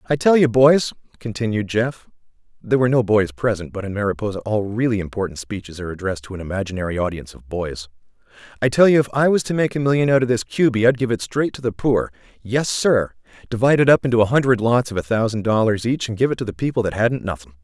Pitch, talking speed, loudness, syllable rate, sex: 115 Hz, 230 wpm, -19 LUFS, 4.3 syllables/s, male